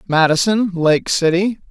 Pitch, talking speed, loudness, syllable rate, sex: 180 Hz, 105 wpm, -16 LUFS, 4.2 syllables/s, male